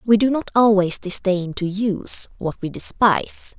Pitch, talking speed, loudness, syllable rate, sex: 200 Hz, 165 wpm, -19 LUFS, 4.5 syllables/s, female